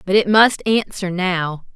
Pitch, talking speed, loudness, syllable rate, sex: 195 Hz, 170 wpm, -17 LUFS, 3.8 syllables/s, female